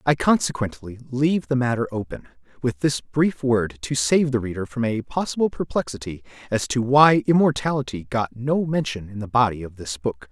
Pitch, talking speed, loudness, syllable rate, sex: 125 Hz, 180 wpm, -22 LUFS, 5.2 syllables/s, male